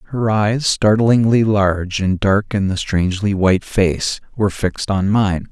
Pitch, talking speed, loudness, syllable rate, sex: 100 Hz, 165 wpm, -17 LUFS, 4.5 syllables/s, male